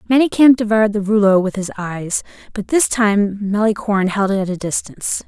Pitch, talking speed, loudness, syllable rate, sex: 210 Hz, 180 wpm, -16 LUFS, 5.6 syllables/s, female